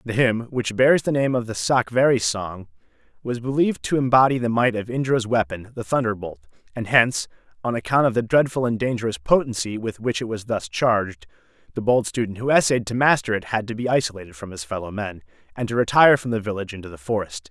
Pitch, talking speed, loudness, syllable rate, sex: 115 Hz, 210 wpm, -21 LUFS, 6.1 syllables/s, male